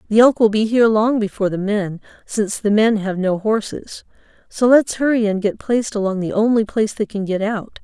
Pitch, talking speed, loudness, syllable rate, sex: 215 Hz, 220 wpm, -18 LUFS, 5.6 syllables/s, female